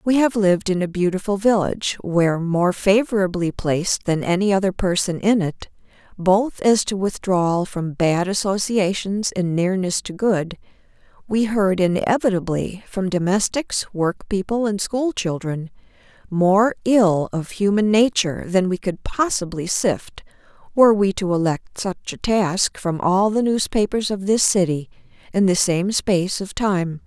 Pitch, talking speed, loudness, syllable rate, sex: 195 Hz, 150 wpm, -20 LUFS, 4.4 syllables/s, female